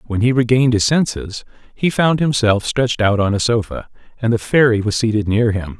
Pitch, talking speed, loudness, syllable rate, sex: 115 Hz, 205 wpm, -16 LUFS, 5.5 syllables/s, male